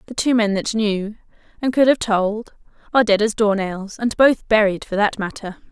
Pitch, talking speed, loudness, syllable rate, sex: 215 Hz, 200 wpm, -19 LUFS, 4.9 syllables/s, female